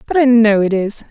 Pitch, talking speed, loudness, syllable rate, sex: 220 Hz, 270 wpm, -13 LUFS, 5.4 syllables/s, female